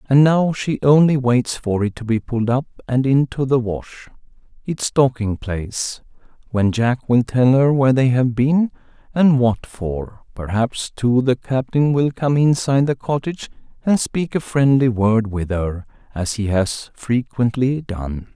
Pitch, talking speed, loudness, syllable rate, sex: 125 Hz, 165 wpm, -18 LUFS, 4.2 syllables/s, male